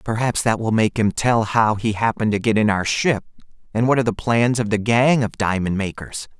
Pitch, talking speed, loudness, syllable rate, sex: 110 Hz, 235 wpm, -19 LUFS, 5.4 syllables/s, male